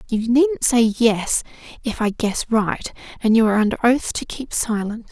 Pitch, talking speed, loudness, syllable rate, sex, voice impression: 225 Hz, 190 wpm, -19 LUFS, 4.6 syllables/s, female, very feminine, slightly adult-like, very thin, slightly tensed, slightly weak, very bright, slightly dark, soft, clear, fluent, slightly raspy, very cute, intellectual, very refreshing, sincere, slightly calm, very friendly, very reassuring, very unique, very elegant, slightly wild, very sweet, lively, kind, slightly intense, slightly modest, light